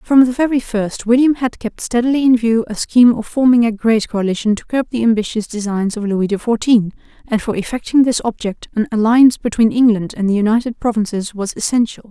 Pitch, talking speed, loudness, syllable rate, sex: 230 Hz, 205 wpm, -16 LUFS, 5.8 syllables/s, female